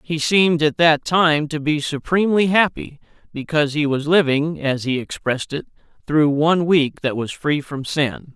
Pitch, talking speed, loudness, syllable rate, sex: 150 Hz, 180 wpm, -18 LUFS, 4.8 syllables/s, male